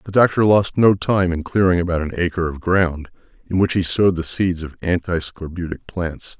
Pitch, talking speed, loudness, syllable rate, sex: 90 Hz, 205 wpm, -19 LUFS, 5.2 syllables/s, male